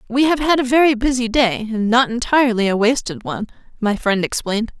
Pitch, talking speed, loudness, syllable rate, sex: 240 Hz, 200 wpm, -17 LUFS, 5.9 syllables/s, female